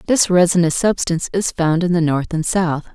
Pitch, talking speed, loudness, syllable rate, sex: 175 Hz, 205 wpm, -17 LUFS, 5.3 syllables/s, female